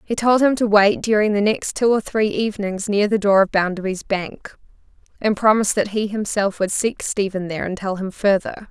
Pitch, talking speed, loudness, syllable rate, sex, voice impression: 205 Hz, 215 wpm, -19 LUFS, 5.3 syllables/s, female, feminine, slightly gender-neutral, slightly young, slightly adult-like, thin, tensed, slightly weak, bright, slightly hard, very clear, fluent, slightly raspy, cute, slightly intellectual, refreshing, sincere, slightly calm, very friendly, reassuring, slightly unique, wild, slightly sweet, lively, slightly kind, slightly intense